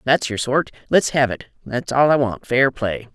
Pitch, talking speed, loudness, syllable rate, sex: 125 Hz, 230 wpm, -19 LUFS, 4.5 syllables/s, male